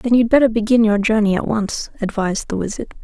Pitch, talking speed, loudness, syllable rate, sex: 215 Hz, 215 wpm, -17 LUFS, 6.0 syllables/s, female